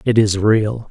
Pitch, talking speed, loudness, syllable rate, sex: 110 Hz, 200 wpm, -16 LUFS, 3.8 syllables/s, male